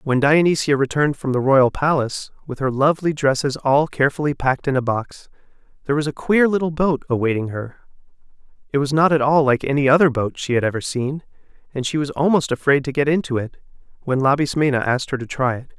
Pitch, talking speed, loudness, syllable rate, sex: 140 Hz, 205 wpm, -19 LUFS, 6.2 syllables/s, male